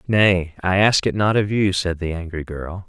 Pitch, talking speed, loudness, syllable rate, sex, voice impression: 95 Hz, 230 wpm, -20 LUFS, 4.9 syllables/s, male, masculine, adult-like, tensed, powerful, slightly dark, clear, cool, slightly intellectual, calm, reassuring, wild, slightly kind, slightly modest